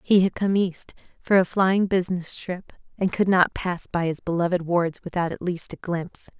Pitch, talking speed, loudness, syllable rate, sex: 180 Hz, 205 wpm, -24 LUFS, 5.1 syllables/s, female